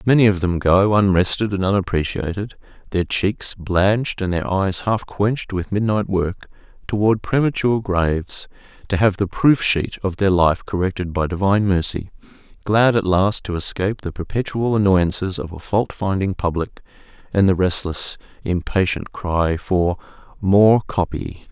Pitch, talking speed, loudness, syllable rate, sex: 95 Hz, 150 wpm, -19 LUFS, 4.7 syllables/s, male